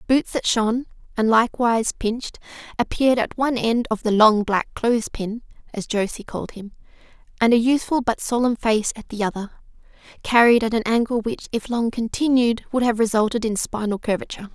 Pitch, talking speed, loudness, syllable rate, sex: 230 Hz, 170 wpm, -21 LUFS, 5.7 syllables/s, female